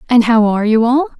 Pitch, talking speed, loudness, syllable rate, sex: 230 Hz, 250 wpm, -12 LUFS, 6.4 syllables/s, female